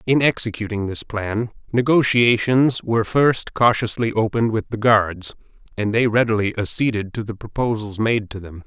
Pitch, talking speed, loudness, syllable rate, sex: 110 Hz, 150 wpm, -20 LUFS, 5.0 syllables/s, male